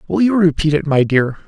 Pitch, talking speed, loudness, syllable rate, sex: 160 Hz, 245 wpm, -15 LUFS, 5.6 syllables/s, male